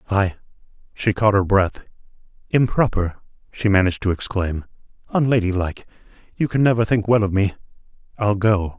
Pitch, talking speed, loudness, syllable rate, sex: 100 Hz, 115 wpm, -20 LUFS, 5.4 syllables/s, male